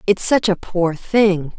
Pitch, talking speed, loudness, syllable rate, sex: 190 Hz, 190 wpm, -17 LUFS, 3.5 syllables/s, female